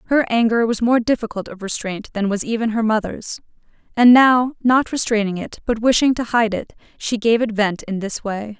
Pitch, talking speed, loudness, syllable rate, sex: 225 Hz, 195 wpm, -18 LUFS, 5.2 syllables/s, female